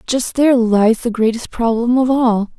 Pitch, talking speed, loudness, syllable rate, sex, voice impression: 235 Hz, 185 wpm, -15 LUFS, 4.6 syllables/s, female, very feminine, slightly young, slightly adult-like, very thin, relaxed, weak, slightly dark, very soft, slightly muffled, slightly halting, very cute, slightly intellectual, sincere, very calm, friendly, reassuring, sweet, kind, modest